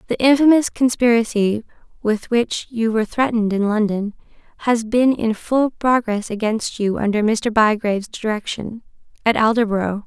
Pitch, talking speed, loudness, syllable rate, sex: 225 Hz, 135 wpm, -19 LUFS, 4.8 syllables/s, female